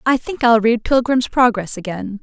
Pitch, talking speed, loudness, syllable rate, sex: 230 Hz, 190 wpm, -16 LUFS, 4.7 syllables/s, female